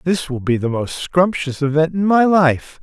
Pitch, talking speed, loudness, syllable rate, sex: 160 Hz, 215 wpm, -17 LUFS, 4.4 syllables/s, male